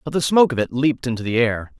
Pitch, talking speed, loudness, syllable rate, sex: 130 Hz, 300 wpm, -19 LUFS, 7.2 syllables/s, male